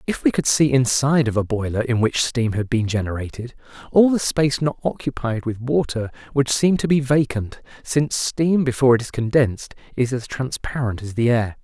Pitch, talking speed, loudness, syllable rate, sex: 125 Hz, 195 wpm, -20 LUFS, 5.4 syllables/s, male